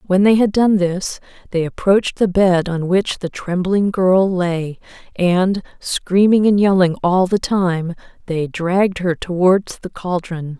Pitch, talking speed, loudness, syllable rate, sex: 185 Hz, 160 wpm, -17 LUFS, 3.9 syllables/s, female